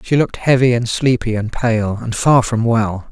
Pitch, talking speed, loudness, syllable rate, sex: 115 Hz, 210 wpm, -16 LUFS, 4.7 syllables/s, male